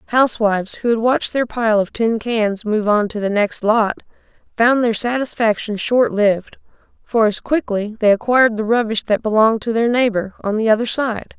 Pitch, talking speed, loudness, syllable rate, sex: 225 Hz, 185 wpm, -17 LUFS, 5.1 syllables/s, female